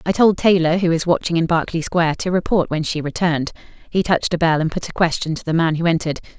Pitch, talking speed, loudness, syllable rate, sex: 165 Hz, 255 wpm, -18 LUFS, 6.8 syllables/s, female